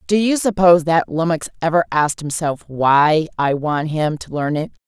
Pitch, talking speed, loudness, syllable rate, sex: 160 Hz, 185 wpm, -17 LUFS, 5.0 syllables/s, female